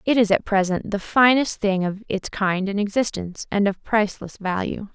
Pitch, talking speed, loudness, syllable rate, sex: 200 Hz, 195 wpm, -22 LUFS, 5.0 syllables/s, female